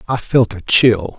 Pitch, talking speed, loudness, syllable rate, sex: 110 Hz, 200 wpm, -14 LUFS, 3.9 syllables/s, male